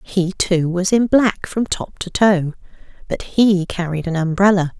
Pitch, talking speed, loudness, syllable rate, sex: 185 Hz, 175 wpm, -18 LUFS, 4.2 syllables/s, female